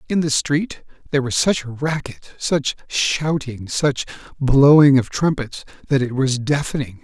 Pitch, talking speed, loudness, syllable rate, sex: 140 Hz, 155 wpm, -19 LUFS, 4.3 syllables/s, male